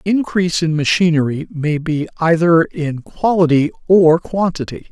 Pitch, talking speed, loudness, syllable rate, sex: 165 Hz, 120 wpm, -15 LUFS, 4.5 syllables/s, male